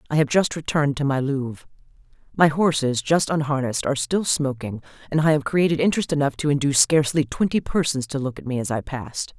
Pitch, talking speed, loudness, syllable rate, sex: 145 Hz, 205 wpm, -22 LUFS, 6.3 syllables/s, female